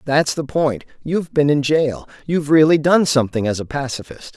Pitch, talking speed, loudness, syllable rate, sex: 140 Hz, 180 wpm, -18 LUFS, 5.4 syllables/s, male